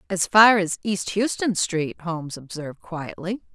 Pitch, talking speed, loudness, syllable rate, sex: 180 Hz, 150 wpm, -22 LUFS, 4.4 syllables/s, female